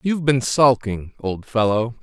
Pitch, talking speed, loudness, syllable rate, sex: 120 Hz, 150 wpm, -20 LUFS, 4.4 syllables/s, male